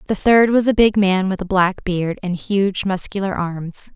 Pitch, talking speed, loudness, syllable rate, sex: 195 Hz, 215 wpm, -18 LUFS, 4.3 syllables/s, female